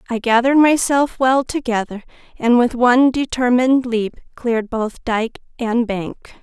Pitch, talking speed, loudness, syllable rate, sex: 240 Hz, 140 wpm, -17 LUFS, 4.6 syllables/s, female